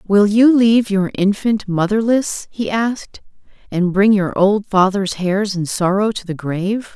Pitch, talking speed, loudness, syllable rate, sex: 200 Hz, 165 wpm, -16 LUFS, 4.3 syllables/s, female